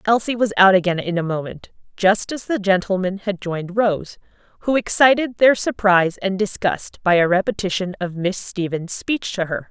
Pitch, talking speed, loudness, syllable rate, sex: 195 Hz, 180 wpm, -19 LUFS, 5.0 syllables/s, female